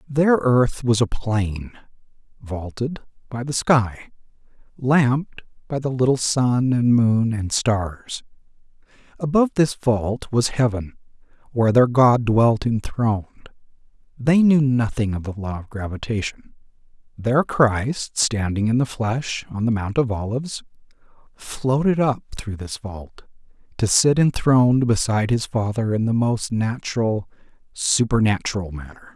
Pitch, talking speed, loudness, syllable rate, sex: 115 Hz, 130 wpm, -20 LUFS, 4.2 syllables/s, male